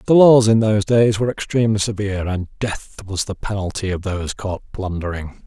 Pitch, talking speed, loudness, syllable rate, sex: 100 Hz, 185 wpm, -19 LUFS, 5.8 syllables/s, male